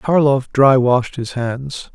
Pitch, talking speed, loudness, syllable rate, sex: 130 Hz, 155 wpm, -16 LUFS, 3.1 syllables/s, male